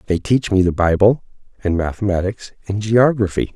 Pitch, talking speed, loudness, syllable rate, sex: 100 Hz, 150 wpm, -17 LUFS, 5.2 syllables/s, male